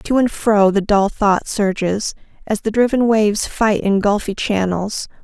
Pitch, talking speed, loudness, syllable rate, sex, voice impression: 210 Hz, 170 wpm, -17 LUFS, 4.2 syllables/s, female, very feminine, slightly adult-like, slightly fluent, slightly cute, slightly calm, friendly, slightly kind